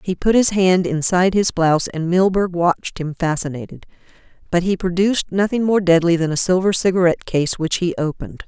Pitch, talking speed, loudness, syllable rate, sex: 175 Hz, 185 wpm, -18 LUFS, 5.7 syllables/s, female